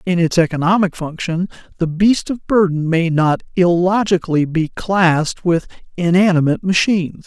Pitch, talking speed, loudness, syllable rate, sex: 175 Hz, 130 wpm, -16 LUFS, 5.0 syllables/s, male